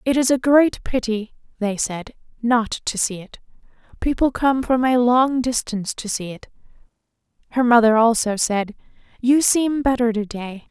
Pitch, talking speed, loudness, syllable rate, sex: 240 Hz, 165 wpm, -19 LUFS, 4.5 syllables/s, female